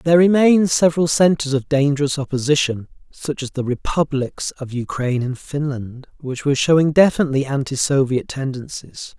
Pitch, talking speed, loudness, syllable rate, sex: 140 Hz, 145 wpm, -18 LUFS, 5.5 syllables/s, male